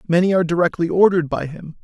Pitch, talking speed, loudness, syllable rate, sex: 170 Hz, 195 wpm, -18 LUFS, 7.3 syllables/s, male